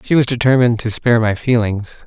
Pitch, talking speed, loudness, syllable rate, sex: 115 Hz, 205 wpm, -15 LUFS, 6.1 syllables/s, male